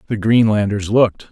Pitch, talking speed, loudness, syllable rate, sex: 105 Hz, 135 wpm, -15 LUFS, 5.4 syllables/s, male